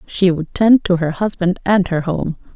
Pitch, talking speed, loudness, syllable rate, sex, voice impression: 185 Hz, 210 wpm, -16 LUFS, 4.4 syllables/s, female, feminine, slightly middle-aged, slightly relaxed, soft, slightly muffled, intellectual, calm, elegant, sharp, modest